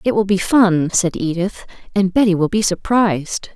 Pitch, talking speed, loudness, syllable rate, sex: 190 Hz, 185 wpm, -17 LUFS, 4.8 syllables/s, female